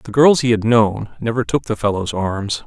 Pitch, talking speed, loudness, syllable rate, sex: 110 Hz, 225 wpm, -17 LUFS, 4.7 syllables/s, male